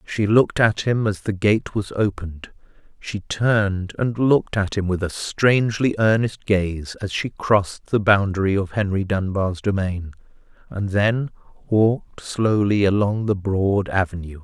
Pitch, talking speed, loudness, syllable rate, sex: 100 Hz, 155 wpm, -21 LUFS, 4.4 syllables/s, male